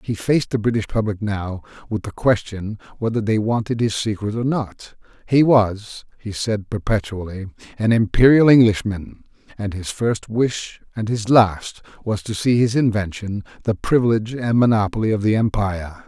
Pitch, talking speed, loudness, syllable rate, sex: 110 Hz, 160 wpm, -19 LUFS, 4.9 syllables/s, male